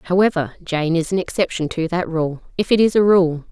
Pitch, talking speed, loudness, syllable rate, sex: 175 Hz, 205 wpm, -19 LUFS, 5.3 syllables/s, female